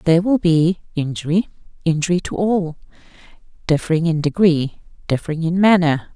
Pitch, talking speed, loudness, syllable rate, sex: 170 Hz, 115 wpm, -18 LUFS, 5.4 syllables/s, female